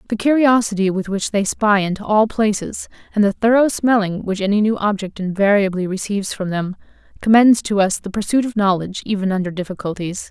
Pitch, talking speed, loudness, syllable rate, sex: 205 Hz, 180 wpm, -18 LUFS, 5.8 syllables/s, female